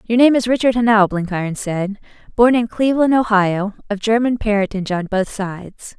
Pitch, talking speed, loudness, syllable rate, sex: 215 Hz, 170 wpm, -17 LUFS, 5.4 syllables/s, female